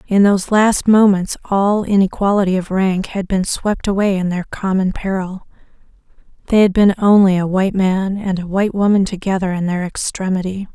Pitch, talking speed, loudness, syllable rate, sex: 190 Hz, 170 wpm, -16 LUFS, 5.2 syllables/s, female